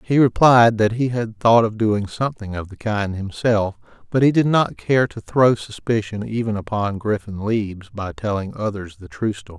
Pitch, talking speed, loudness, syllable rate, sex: 110 Hz, 195 wpm, -20 LUFS, 4.8 syllables/s, male